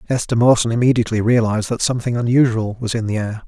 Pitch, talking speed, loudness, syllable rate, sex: 115 Hz, 190 wpm, -17 LUFS, 7.1 syllables/s, male